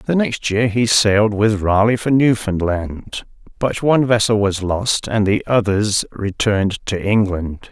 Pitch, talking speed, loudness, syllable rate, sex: 105 Hz, 155 wpm, -17 LUFS, 4.1 syllables/s, male